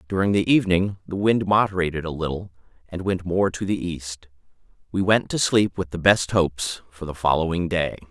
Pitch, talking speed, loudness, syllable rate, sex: 90 Hz, 190 wpm, -22 LUFS, 5.3 syllables/s, male